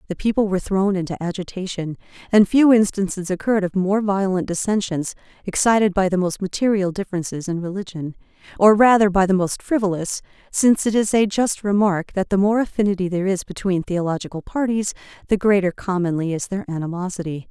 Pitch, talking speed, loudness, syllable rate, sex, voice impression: 195 Hz, 170 wpm, -20 LUFS, 5.8 syllables/s, female, feminine, middle-aged, tensed, powerful, clear, fluent, intellectual, friendly, reassuring, elegant, lively